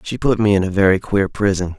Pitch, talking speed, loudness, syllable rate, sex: 100 Hz, 270 wpm, -17 LUFS, 5.9 syllables/s, male